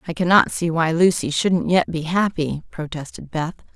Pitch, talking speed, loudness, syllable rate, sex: 165 Hz, 175 wpm, -20 LUFS, 4.8 syllables/s, female